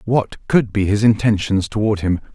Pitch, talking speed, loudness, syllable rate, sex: 105 Hz, 180 wpm, -18 LUFS, 4.7 syllables/s, male